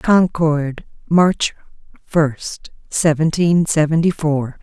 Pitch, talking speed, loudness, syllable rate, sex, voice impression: 155 Hz, 80 wpm, -17 LUFS, 3.0 syllables/s, female, very feminine, middle-aged, thin, tensed, powerful, bright, slightly soft, very clear, fluent, raspy, slightly cool, intellectual, refreshing, sincere, calm, slightly friendly, slightly reassuring, very unique, elegant, wild, slightly sweet, lively, kind, intense, sharp